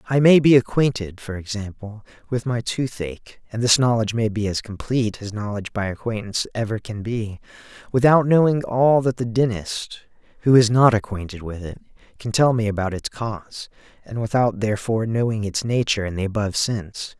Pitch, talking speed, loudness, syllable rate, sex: 110 Hz, 180 wpm, -21 LUFS, 5.4 syllables/s, male